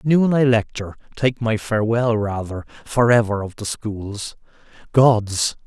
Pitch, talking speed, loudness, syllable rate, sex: 110 Hz, 140 wpm, -20 LUFS, 4.3 syllables/s, male